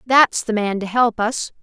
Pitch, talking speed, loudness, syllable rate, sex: 225 Hz, 220 wpm, -18 LUFS, 4.2 syllables/s, female